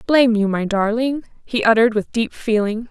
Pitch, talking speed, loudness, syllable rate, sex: 225 Hz, 185 wpm, -18 LUFS, 5.5 syllables/s, female